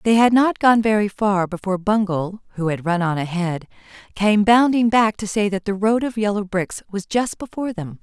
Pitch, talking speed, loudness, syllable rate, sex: 205 Hz, 210 wpm, -19 LUFS, 5.1 syllables/s, female